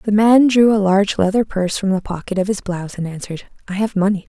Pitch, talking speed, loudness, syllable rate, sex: 200 Hz, 250 wpm, -17 LUFS, 6.5 syllables/s, female